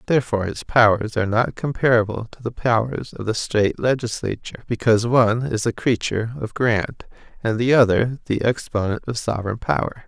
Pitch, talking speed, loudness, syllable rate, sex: 115 Hz, 165 wpm, -21 LUFS, 5.9 syllables/s, male